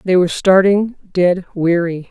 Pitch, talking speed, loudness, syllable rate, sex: 180 Hz, 145 wpm, -15 LUFS, 4.3 syllables/s, female